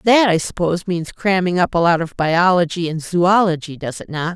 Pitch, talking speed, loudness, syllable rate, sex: 175 Hz, 205 wpm, -17 LUFS, 5.2 syllables/s, female